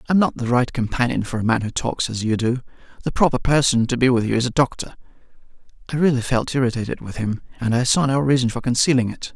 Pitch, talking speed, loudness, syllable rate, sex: 125 Hz, 235 wpm, -20 LUFS, 6.5 syllables/s, male